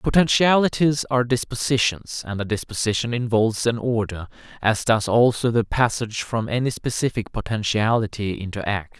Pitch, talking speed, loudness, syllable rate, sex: 115 Hz, 135 wpm, -22 LUFS, 5.2 syllables/s, male